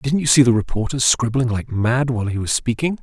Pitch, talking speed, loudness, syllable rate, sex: 125 Hz, 240 wpm, -18 LUFS, 5.7 syllables/s, male